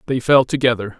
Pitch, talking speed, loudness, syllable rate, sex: 125 Hz, 180 wpm, -16 LUFS, 6.2 syllables/s, male